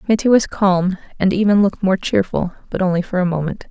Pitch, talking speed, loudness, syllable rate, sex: 190 Hz, 210 wpm, -17 LUFS, 5.9 syllables/s, female